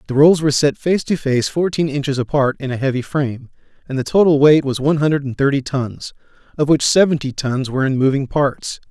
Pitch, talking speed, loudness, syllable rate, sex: 140 Hz, 215 wpm, -17 LUFS, 5.9 syllables/s, male